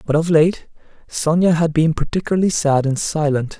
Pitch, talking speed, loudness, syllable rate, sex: 160 Hz, 165 wpm, -17 LUFS, 5.2 syllables/s, male